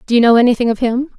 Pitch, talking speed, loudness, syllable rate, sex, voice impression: 240 Hz, 305 wpm, -13 LUFS, 7.6 syllables/s, female, feminine, slightly middle-aged, clear, slightly intellectual, sincere, calm, slightly elegant